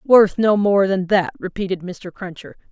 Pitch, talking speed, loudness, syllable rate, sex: 190 Hz, 175 wpm, -18 LUFS, 4.4 syllables/s, female